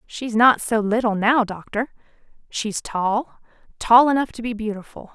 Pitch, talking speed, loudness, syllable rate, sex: 230 Hz, 140 wpm, -20 LUFS, 4.4 syllables/s, female